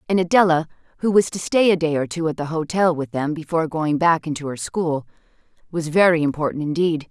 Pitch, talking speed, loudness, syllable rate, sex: 160 Hz, 210 wpm, -20 LUFS, 5.9 syllables/s, female